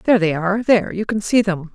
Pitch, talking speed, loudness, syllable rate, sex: 200 Hz, 275 wpm, -18 LUFS, 6.4 syllables/s, female